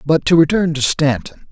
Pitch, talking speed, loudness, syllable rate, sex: 155 Hz, 200 wpm, -15 LUFS, 5.0 syllables/s, male